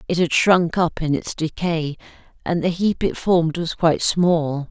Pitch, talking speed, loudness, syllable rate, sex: 165 Hz, 190 wpm, -20 LUFS, 4.5 syllables/s, female